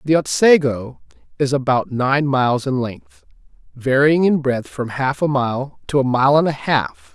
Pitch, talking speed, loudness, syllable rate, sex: 130 Hz, 175 wpm, -18 LUFS, 4.2 syllables/s, male